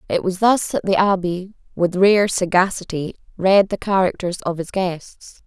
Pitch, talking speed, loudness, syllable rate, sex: 185 Hz, 165 wpm, -19 LUFS, 4.5 syllables/s, female